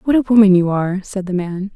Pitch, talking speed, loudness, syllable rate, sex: 195 Hz, 275 wpm, -16 LUFS, 6.0 syllables/s, female